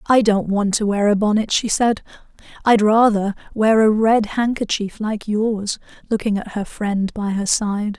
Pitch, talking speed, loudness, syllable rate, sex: 210 Hz, 180 wpm, -18 LUFS, 3.5 syllables/s, female